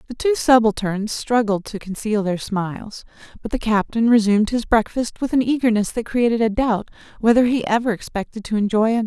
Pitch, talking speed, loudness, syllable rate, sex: 220 Hz, 185 wpm, -19 LUFS, 5.7 syllables/s, female